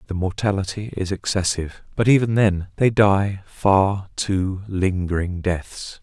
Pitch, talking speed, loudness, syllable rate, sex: 95 Hz, 130 wpm, -21 LUFS, 4.0 syllables/s, male